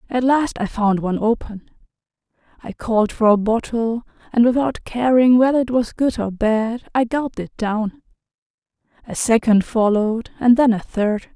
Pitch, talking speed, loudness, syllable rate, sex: 230 Hz, 165 wpm, -18 LUFS, 4.8 syllables/s, female